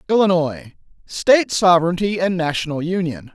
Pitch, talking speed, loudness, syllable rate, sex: 175 Hz, 90 wpm, -18 LUFS, 5.2 syllables/s, male